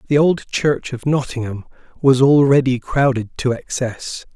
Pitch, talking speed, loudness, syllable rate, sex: 130 Hz, 140 wpm, -17 LUFS, 4.2 syllables/s, male